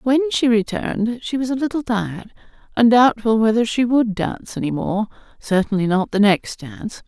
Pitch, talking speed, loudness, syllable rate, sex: 225 Hz, 170 wpm, -19 LUFS, 5.2 syllables/s, female